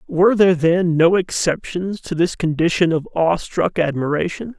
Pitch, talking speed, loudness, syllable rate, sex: 170 Hz, 145 wpm, -18 LUFS, 5.0 syllables/s, male